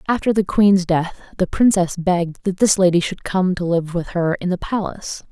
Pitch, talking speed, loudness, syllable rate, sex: 185 Hz, 215 wpm, -18 LUFS, 5.1 syllables/s, female